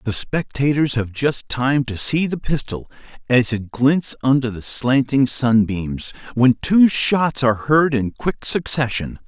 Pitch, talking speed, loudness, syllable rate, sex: 130 Hz, 140 wpm, -18 LUFS, 3.9 syllables/s, male